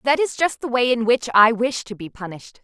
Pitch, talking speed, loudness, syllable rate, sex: 225 Hz, 275 wpm, -19 LUFS, 5.7 syllables/s, female